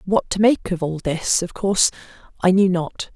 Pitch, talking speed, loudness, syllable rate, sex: 185 Hz, 210 wpm, -20 LUFS, 4.7 syllables/s, female